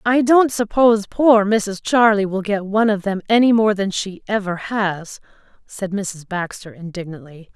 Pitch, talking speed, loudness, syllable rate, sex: 205 Hz, 165 wpm, -18 LUFS, 4.6 syllables/s, female